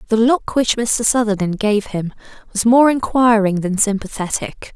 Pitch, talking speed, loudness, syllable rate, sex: 220 Hz, 150 wpm, -16 LUFS, 4.6 syllables/s, female